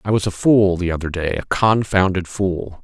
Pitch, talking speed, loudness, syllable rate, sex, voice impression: 95 Hz, 190 wpm, -18 LUFS, 4.9 syllables/s, male, masculine, adult-like, thick, slightly muffled, cool, slightly intellectual, slightly calm, slightly sweet